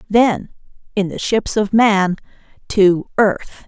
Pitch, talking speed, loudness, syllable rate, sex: 205 Hz, 100 wpm, -16 LUFS, 3.7 syllables/s, female